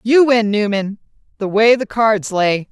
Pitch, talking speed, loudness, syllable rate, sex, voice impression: 215 Hz, 175 wpm, -15 LUFS, 4.1 syllables/s, female, feminine, very adult-like, slightly powerful, slightly cool, intellectual, slightly strict, slightly sharp